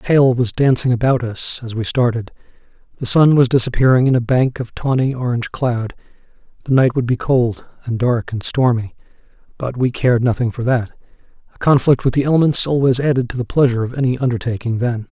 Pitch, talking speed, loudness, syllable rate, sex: 125 Hz, 195 wpm, -17 LUFS, 5.9 syllables/s, male